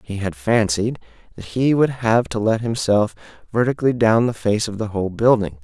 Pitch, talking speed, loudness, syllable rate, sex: 110 Hz, 190 wpm, -19 LUFS, 5.2 syllables/s, male